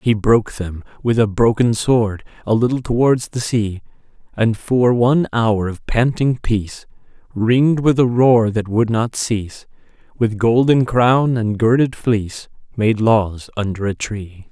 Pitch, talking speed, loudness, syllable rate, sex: 115 Hz, 155 wpm, -17 LUFS, 4.2 syllables/s, male